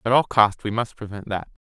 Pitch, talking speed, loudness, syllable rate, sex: 110 Hz, 250 wpm, -22 LUFS, 5.6 syllables/s, male